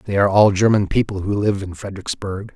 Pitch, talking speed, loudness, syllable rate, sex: 100 Hz, 210 wpm, -19 LUFS, 6.0 syllables/s, male